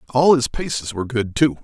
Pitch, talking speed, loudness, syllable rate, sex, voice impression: 125 Hz, 220 wpm, -19 LUFS, 5.8 syllables/s, male, very masculine, very adult-like, middle-aged, very thick, very tensed, very powerful, bright, hard, slightly muffled, very fluent, slightly raspy, very cool, slightly intellectual, slightly refreshing, sincere, slightly calm, very mature, wild, very lively, slightly strict, slightly intense